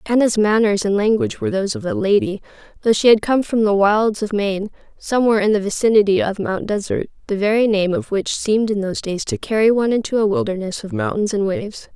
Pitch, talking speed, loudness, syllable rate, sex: 210 Hz, 220 wpm, -18 LUFS, 6.3 syllables/s, female